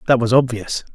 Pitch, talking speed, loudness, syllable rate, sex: 120 Hz, 190 wpm, -18 LUFS, 5.6 syllables/s, male